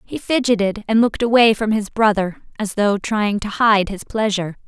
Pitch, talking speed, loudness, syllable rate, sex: 210 Hz, 195 wpm, -18 LUFS, 5.1 syllables/s, female